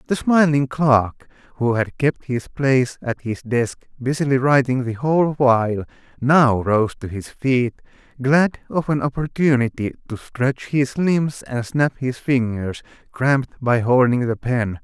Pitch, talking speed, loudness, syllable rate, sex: 130 Hz, 155 wpm, -20 LUFS, 4.1 syllables/s, male